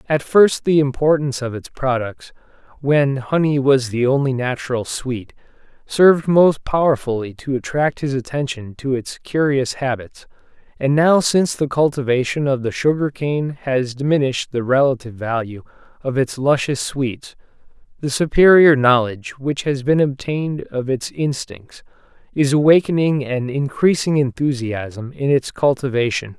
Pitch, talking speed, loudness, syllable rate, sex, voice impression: 135 Hz, 140 wpm, -18 LUFS, 4.7 syllables/s, male, masculine, adult-like, bright, clear, slightly halting, cool, intellectual, slightly refreshing, friendly, lively, kind, slightly modest